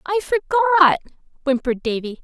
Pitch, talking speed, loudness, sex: 320 Hz, 105 wpm, -19 LUFS, female